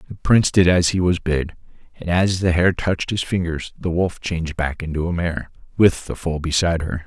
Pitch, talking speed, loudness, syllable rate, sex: 85 Hz, 220 wpm, -20 LUFS, 5.4 syllables/s, male